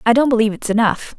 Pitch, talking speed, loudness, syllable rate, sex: 230 Hz, 255 wpm, -16 LUFS, 7.5 syllables/s, female